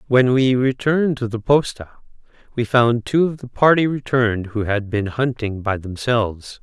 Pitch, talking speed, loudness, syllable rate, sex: 120 Hz, 170 wpm, -19 LUFS, 4.7 syllables/s, male